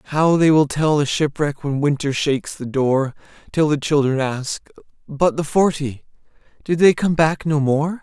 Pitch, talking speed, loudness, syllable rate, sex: 150 Hz, 180 wpm, -19 LUFS, 4.5 syllables/s, male